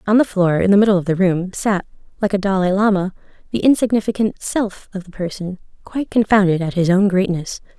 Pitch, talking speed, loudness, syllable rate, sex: 195 Hz, 200 wpm, -18 LUFS, 5.9 syllables/s, female